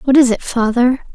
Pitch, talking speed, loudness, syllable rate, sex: 245 Hz, 210 wpm, -14 LUFS, 4.8 syllables/s, female